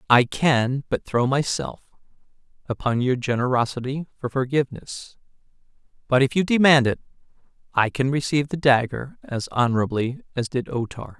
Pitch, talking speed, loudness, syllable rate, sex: 135 Hz, 140 wpm, -22 LUFS, 5.1 syllables/s, male